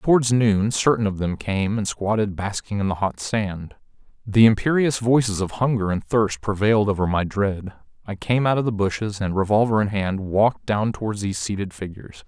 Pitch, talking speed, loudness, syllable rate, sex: 105 Hz, 195 wpm, -21 LUFS, 5.2 syllables/s, male